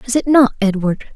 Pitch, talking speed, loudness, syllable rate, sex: 235 Hz, 210 wpm, -15 LUFS, 6.0 syllables/s, female